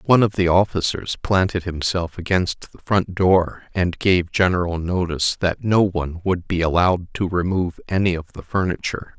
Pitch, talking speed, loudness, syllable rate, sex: 90 Hz, 170 wpm, -20 LUFS, 5.1 syllables/s, male